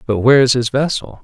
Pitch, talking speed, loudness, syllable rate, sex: 125 Hz, 245 wpm, -14 LUFS, 6.4 syllables/s, male